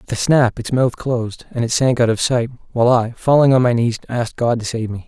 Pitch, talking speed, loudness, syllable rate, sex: 120 Hz, 270 wpm, -17 LUFS, 5.8 syllables/s, male